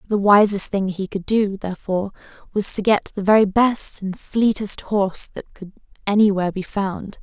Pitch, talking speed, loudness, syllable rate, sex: 200 Hz, 175 wpm, -19 LUFS, 5.0 syllables/s, female